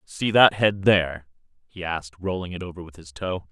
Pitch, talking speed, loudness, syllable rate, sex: 90 Hz, 205 wpm, -22 LUFS, 5.3 syllables/s, male